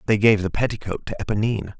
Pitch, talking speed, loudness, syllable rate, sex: 105 Hz, 200 wpm, -22 LUFS, 7.5 syllables/s, male